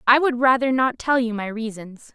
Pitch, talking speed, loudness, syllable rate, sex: 240 Hz, 225 wpm, -20 LUFS, 5.0 syllables/s, female